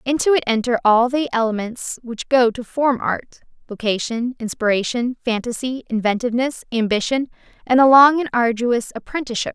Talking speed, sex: 150 wpm, female